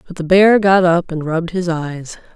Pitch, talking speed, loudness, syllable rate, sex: 175 Hz, 230 wpm, -14 LUFS, 4.9 syllables/s, female